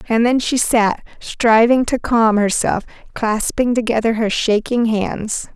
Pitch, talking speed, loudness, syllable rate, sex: 225 Hz, 140 wpm, -16 LUFS, 3.9 syllables/s, female